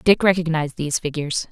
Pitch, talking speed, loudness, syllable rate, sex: 160 Hz, 160 wpm, -21 LUFS, 7.1 syllables/s, female